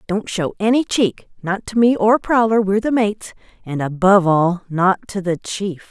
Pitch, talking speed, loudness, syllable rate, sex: 200 Hz, 175 wpm, -17 LUFS, 4.8 syllables/s, female